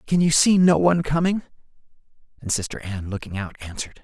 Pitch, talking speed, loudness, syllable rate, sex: 140 Hz, 180 wpm, -21 LUFS, 7.0 syllables/s, male